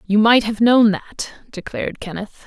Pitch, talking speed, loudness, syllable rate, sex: 215 Hz, 170 wpm, -17 LUFS, 4.5 syllables/s, female